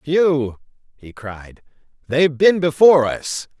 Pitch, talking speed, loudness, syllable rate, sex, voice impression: 145 Hz, 115 wpm, -16 LUFS, 3.9 syllables/s, male, very masculine, very adult-like, very middle-aged, very thick, tensed, powerful, very bright, soft, very clear, fluent, cool, very intellectual, very refreshing, very sincere, very calm, mature, very friendly, very reassuring, very unique, elegant, slightly wild, very sweet, very lively, very kind, slightly intense, slightly light